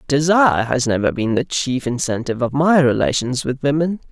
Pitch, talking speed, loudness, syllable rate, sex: 135 Hz, 175 wpm, -18 LUFS, 5.4 syllables/s, male